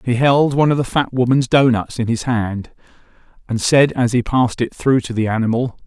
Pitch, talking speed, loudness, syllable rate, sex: 125 Hz, 215 wpm, -17 LUFS, 5.4 syllables/s, male